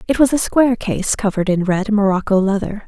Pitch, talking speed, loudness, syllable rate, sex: 210 Hz, 210 wpm, -17 LUFS, 5.9 syllables/s, female